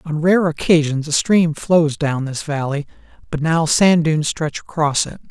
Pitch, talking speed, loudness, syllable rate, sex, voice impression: 155 Hz, 180 wpm, -17 LUFS, 4.5 syllables/s, male, masculine, adult-like, thick, tensed, bright, soft, raspy, refreshing, friendly, wild, kind, modest